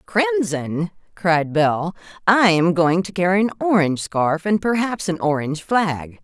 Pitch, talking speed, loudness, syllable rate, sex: 180 Hz, 155 wpm, -19 LUFS, 4.4 syllables/s, female